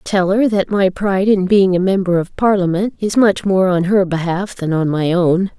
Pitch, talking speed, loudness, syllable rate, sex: 190 Hz, 225 wpm, -15 LUFS, 4.8 syllables/s, female